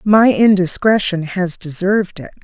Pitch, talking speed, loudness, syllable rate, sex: 185 Hz, 125 wpm, -15 LUFS, 4.5 syllables/s, female